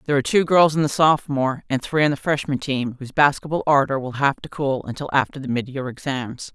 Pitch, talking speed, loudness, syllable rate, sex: 140 Hz, 240 wpm, -21 LUFS, 6.2 syllables/s, female